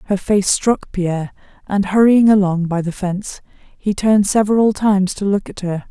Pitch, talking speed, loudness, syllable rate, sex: 200 Hz, 185 wpm, -16 LUFS, 5.2 syllables/s, female